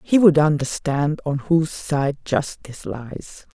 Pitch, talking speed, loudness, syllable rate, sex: 150 Hz, 135 wpm, -20 LUFS, 3.9 syllables/s, female